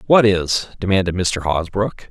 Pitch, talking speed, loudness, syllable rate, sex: 95 Hz, 145 wpm, -18 LUFS, 4.4 syllables/s, male